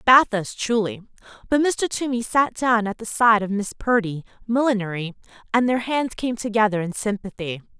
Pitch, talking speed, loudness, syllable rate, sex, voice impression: 220 Hz, 160 wpm, -22 LUFS, 5.0 syllables/s, female, very feminine, slightly young, adult-like, very thin, tensed, slightly powerful, very bright, hard, very clear, very fluent, cute, intellectual, very refreshing, slightly sincere, slightly calm, slightly friendly, slightly reassuring, very unique, slightly elegant, wild, sweet, very lively, strict, slightly intense, sharp, light